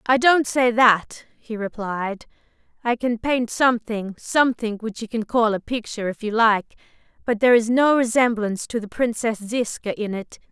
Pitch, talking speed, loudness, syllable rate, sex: 230 Hz, 165 wpm, -21 LUFS, 4.9 syllables/s, female